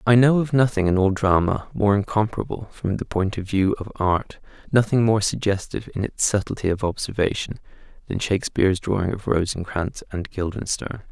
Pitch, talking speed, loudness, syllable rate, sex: 100 Hz, 165 wpm, -22 LUFS, 5.4 syllables/s, male